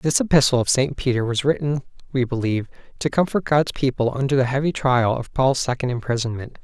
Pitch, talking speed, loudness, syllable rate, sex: 130 Hz, 190 wpm, -21 LUFS, 5.8 syllables/s, male